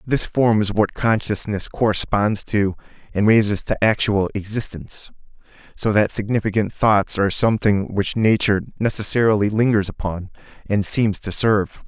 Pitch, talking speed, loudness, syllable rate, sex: 105 Hz, 135 wpm, -19 LUFS, 5.0 syllables/s, male